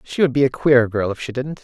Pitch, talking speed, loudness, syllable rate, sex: 130 Hz, 330 wpm, -18 LUFS, 5.9 syllables/s, male